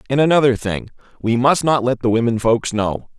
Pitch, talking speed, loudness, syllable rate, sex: 120 Hz, 190 wpm, -17 LUFS, 5.3 syllables/s, male